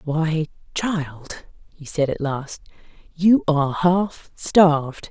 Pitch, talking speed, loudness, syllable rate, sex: 160 Hz, 120 wpm, -21 LUFS, 3.1 syllables/s, female